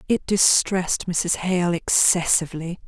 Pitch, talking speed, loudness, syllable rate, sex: 185 Hz, 105 wpm, -20 LUFS, 4.2 syllables/s, female